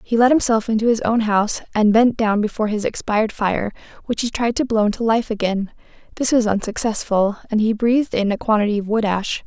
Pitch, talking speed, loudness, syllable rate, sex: 220 Hz, 215 wpm, -19 LUFS, 5.9 syllables/s, female